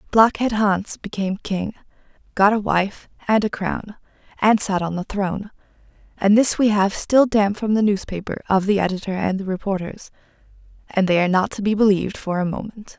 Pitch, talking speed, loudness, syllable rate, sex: 200 Hz, 180 wpm, -20 LUFS, 5.4 syllables/s, female